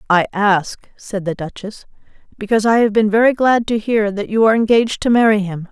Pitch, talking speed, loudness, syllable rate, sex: 210 Hz, 210 wpm, -15 LUFS, 5.7 syllables/s, female